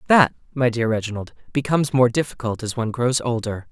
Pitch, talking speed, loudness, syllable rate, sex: 120 Hz, 195 wpm, -21 LUFS, 6.2 syllables/s, male